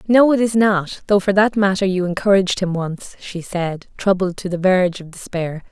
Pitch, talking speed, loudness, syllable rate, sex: 190 Hz, 210 wpm, -18 LUFS, 5.1 syllables/s, female